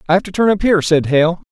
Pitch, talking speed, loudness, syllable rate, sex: 175 Hz, 315 wpm, -14 LUFS, 7.1 syllables/s, male